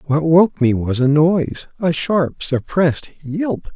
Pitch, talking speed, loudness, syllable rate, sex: 155 Hz, 145 wpm, -17 LUFS, 3.9 syllables/s, male